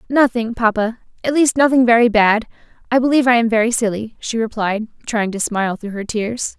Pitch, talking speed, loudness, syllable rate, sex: 230 Hz, 190 wpm, -17 LUFS, 5.6 syllables/s, female